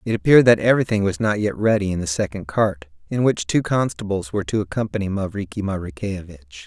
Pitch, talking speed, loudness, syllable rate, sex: 100 Hz, 190 wpm, -20 LUFS, 6.4 syllables/s, male